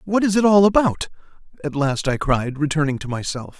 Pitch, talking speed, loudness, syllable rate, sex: 160 Hz, 200 wpm, -19 LUFS, 5.5 syllables/s, male